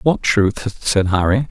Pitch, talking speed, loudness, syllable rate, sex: 110 Hz, 160 wpm, -17 LUFS, 3.6 syllables/s, male